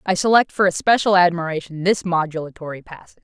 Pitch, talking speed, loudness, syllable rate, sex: 175 Hz, 150 wpm, -18 LUFS, 6.5 syllables/s, female